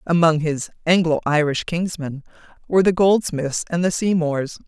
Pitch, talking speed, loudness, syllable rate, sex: 165 Hz, 140 wpm, -20 LUFS, 4.7 syllables/s, female